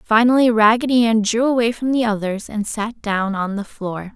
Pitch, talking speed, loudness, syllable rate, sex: 220 Hz, 200 wpm, -18 LUFS, 4.9 syllables/s, female